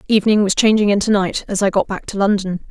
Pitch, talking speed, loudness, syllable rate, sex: 200 Hz, 245 wpm, -16 LUFS, 6.5 syllables/s, female